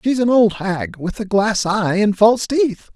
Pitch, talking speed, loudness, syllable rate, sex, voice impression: 210 Hz, 225 wpm, -17 LUFS, 4.3 syllables/s, male, very masculine, middle-aged, thick, tensed, slightly powerful, bright, soft, clear, fluent, slightly raspy, very cool, very intellectual, refreshing, very sincere, calm, very mature, very friendly, very reassuring, unique, slightly elegant, very wild, slightly sweet, very lively, kind, slightly intense